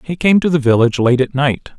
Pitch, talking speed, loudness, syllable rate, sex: 140 Hz, 270 wpm, -14 LUFS, 6.1 syllables/s, male